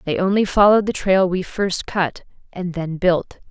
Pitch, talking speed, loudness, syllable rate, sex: 185 Hz, 190 wpm, -19 LUFS, 4.7 syllables/s, female